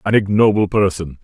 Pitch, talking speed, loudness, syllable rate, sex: 100 Hz, 145 wpm, -16 LUFS, 5.3 syllables/s, male